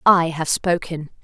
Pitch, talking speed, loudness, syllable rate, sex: 165 Hz, 145 wpm, -20 LUFS, 3.9 syllables/s, female